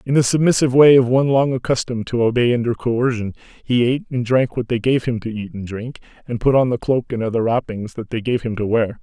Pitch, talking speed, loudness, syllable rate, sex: 120 Hz, 255 wpm, -18 LUFS, 6.1 syllables/s, male